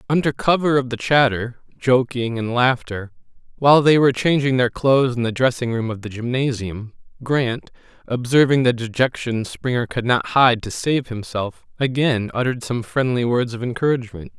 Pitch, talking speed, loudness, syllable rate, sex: 125 Hz, 165 wpm, -19 LUFS, 5.1 syllables/s, male